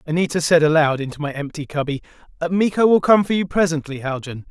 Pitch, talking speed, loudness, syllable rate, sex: 160 Hz, 185 wpm, -19 LUFS, 6.2 syllables/s, male